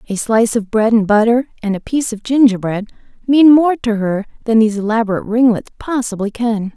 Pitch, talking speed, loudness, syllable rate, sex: 225 Hz, 185 wpm, -15 LUFS, 5.9 syllables/s, female